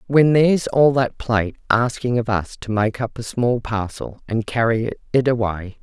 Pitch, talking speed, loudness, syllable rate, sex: 115 Hz, 185 wpm, -20 LUFS, 4.6 syllables/s, female